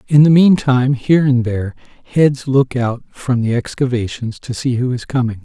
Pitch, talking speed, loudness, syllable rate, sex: 130 Hz, 190 wpm, -15 LUFS, 5.1 syllables/s, male